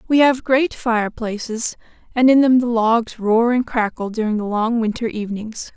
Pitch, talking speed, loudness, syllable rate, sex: 230 Hz, 175 wpm, -18 LUFS, 4.8 syllables/s, female